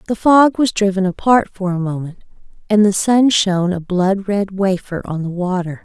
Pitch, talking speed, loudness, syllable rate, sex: 195 Hz, 195 wpm, -16 LUFS, 4.8 syllables/s, female